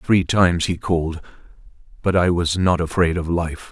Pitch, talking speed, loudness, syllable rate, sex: 85 Hz, 160 wpm, -19 LUFS, 5.1 syllables/s, male